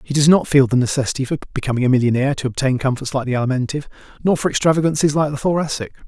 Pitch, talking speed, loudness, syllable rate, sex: 140 Hz, 215 wpm, -18 LUFS, 7.8 syllables/s, male